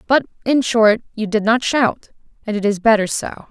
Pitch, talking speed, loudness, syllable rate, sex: 225 Hz, 205 wpm, -17 LUFS, 4.9 syllables/s, female